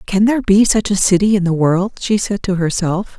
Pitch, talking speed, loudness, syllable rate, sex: 195 Hz, 245 wpm, -15 LUFS, 5.3 syllables/s, female